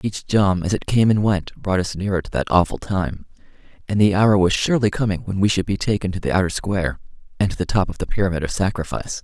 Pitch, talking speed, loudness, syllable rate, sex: 95 Hz, 245 wpm, -20 LUFS, 6.3 syllables/s, male